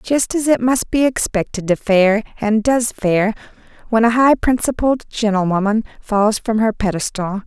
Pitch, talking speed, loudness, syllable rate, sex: 220 Hz, 160 wpm, -17 LUFS, 4.6 syllables/s, female